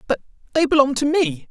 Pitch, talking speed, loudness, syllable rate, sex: 275 Hz, 200 wpm, -19 LUFS, 5.9 syllables/s, female